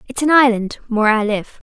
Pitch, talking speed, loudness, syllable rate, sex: 230 Hz, 210 wpm, -16 LUFS, 5.9 syllables/s, female